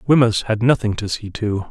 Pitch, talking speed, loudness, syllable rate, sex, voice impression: 110 Hz, 210 wpm, -19 LUFS, 5.1 syllables/s, male, masculine, slightly middle-aged, slightly tensed, hard, clear, fluent, intellectual, calm, friendly, reassuring, slightly wild, kind, modest